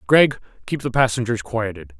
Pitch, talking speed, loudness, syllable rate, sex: 115 Hz, 150 wpm, -20 LUFS, 5.2 syllables/s, male